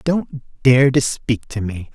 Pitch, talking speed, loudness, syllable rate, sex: 130 Hz, 185 wpm, -18 LUFS, 3.3 syllables/s, male